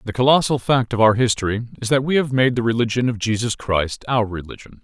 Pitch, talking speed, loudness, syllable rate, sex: 120 Hz, 225 wpm, -19 LUFS, 6.1 syllables/s, male